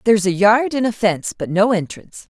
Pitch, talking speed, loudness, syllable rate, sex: 205 Hz, 225 wpm, -17 LUFS, 6.1 syllables/s, female